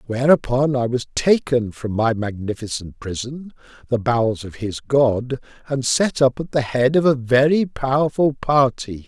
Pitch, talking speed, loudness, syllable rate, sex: 125 Hz, 160 wpm, -19 LUFS, 4.4 syllables/s, male